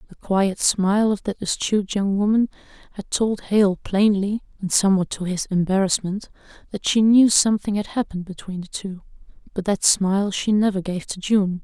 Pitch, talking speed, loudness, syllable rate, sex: 195 Hz, 175 wpm, -21 LUFS, 5.2 syllables/s, female